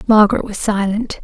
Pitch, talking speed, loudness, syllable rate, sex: 215 Hz, 145 wpm, -16 LUFS, 5.6 syllables/s, female